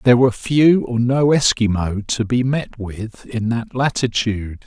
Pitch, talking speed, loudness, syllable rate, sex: 120 Hz, 165 wpm, -18 LUFS, 4.5 syllables/s, male